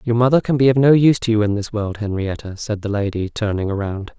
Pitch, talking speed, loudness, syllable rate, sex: 110 Hz, 260 wpm, -18 LUFS, 6.1 syllables/s, male